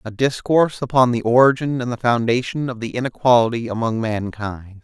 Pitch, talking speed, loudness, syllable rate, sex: 120 Hz, 160 wpm, -19 LUFS, 5.5 syllables/s, male